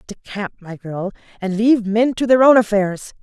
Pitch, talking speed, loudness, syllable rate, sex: 210 Hz, 185 wpm, -17 LUFS, 4.9 syllables/s, female